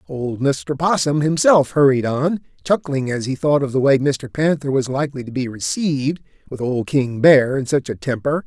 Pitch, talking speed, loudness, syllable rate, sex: 135 Hz, 200 wpm, -18 LUFS, 4.9 syllables/s, male